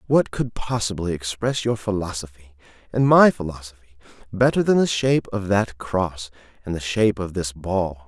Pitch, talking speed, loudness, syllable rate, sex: 100 Hz, 165 wpm, -22 LUFS, 5.1 syllables/s, male